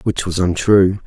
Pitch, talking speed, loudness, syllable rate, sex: 95 Hz, 170 wpm, -15 LUFS, 4.2 syllables/s, male